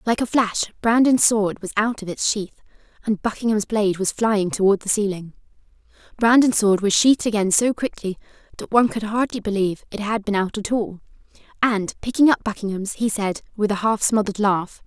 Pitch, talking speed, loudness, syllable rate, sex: 210 Hz, 190 wpm, -20 LUFS, 5.6 syllables/s, female